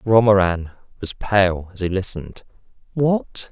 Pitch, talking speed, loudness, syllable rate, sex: 100 Hz, 120 wpm, -20 LUFS, 4.2 syllables/s, male